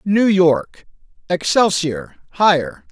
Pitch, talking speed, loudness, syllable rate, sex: 190 Hz, 60 wpm, -16 LUFS, 3.3 syllables/s, male